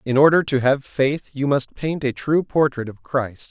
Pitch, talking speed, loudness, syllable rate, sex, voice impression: 135 Hz, 220 wpm, -20 LUFS, 4.4 syllables/s, male, masculine, adult-like, tensed, bright, clear, slightly halting, friendly, wild, lively, slightly kind, slightly modest